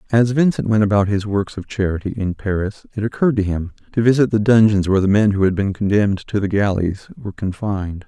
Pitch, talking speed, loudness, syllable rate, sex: 100 Hz, 225 wpm, -18 LUFS, 6.1 syllables/s, male